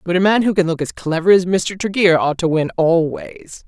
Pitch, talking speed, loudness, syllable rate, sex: 175 Hz, 245 wpm, -16 LUFS, 5.1 syllables/s, female